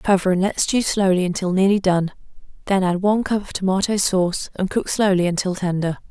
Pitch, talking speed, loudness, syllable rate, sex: 190 Hz, 195 wpm, -20 LUFS, 5.7 syllables/s, female